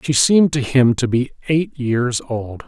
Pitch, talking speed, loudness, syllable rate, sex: 130 Hz, 200 wpm, -17 LUFS, 4.3 syllables/s, male